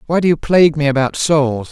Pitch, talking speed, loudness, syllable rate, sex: 150 Hz, 245 wpm, -14 LUFS, 5.8 syllables/s, male